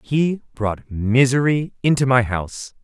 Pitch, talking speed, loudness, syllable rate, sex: 125 Hz, 125 wpm, -19 LUFS, 4.1 syllables/s, male